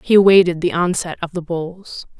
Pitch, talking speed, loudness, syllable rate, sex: 175 Hz, 190 wpm, -16 LUFS, 5.1 syllables/s, female